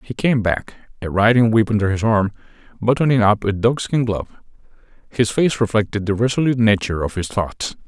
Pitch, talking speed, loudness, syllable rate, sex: 110 Hz, 175 wpm, -18 LUFS, 5.8 syllables/s, male